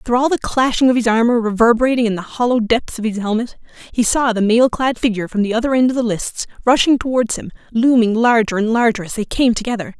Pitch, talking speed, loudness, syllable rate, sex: 230 Hz, 235 wpm, -16 LUFS, 6.2 syllables/s, female